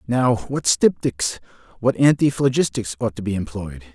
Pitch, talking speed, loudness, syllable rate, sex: 115 Hz, 135 wpm, -20 LUFS, 4.6 syllables/s, male